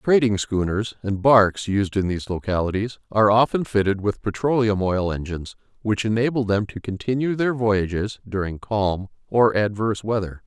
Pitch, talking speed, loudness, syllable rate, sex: 105 Hz, 155 wpm, -22 LUFS, 5.1 syllables/s, male